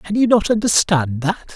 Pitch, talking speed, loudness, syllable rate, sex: 190 Hz, 195 wpm, -17 LUFS, 4.6 syllables/s, male